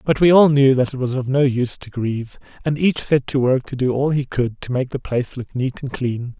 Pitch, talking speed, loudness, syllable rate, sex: 130 Hz, 280 wpm, -19 LUFS, 5.6 syllables/s, male